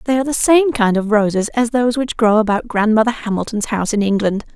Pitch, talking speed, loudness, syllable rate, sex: 225 Hz, 225 wpm, -16 LUFS, 6.3 syllables/s, female